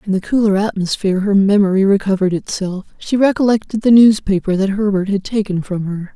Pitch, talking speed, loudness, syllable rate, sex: 200 Hz, 175 wpm, -15 LUFS, 5.9 syllables/s, female